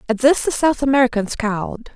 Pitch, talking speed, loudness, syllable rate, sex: 250 Hz, 185 wpm, -18 LUFS, 5.8 syllables/s, female